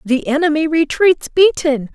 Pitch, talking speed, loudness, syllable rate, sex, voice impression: 305 Hz, 125 wpm, -15 LUFS, 4.4 syllables/s, female, feminine, adult-like, tensed, powerful, clear, fluent, intellectual, slightly elegant, lively, slightly strict, slightly sharp